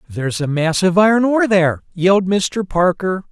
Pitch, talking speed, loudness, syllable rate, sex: 185 Hz, 180 wpm, -16 LUFS, 5.3 syllables/s, male